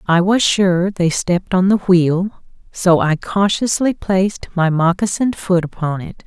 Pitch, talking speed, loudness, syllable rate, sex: 185 Hz, 165 wpm, -16 LUFS, 4.3 syllables/s, female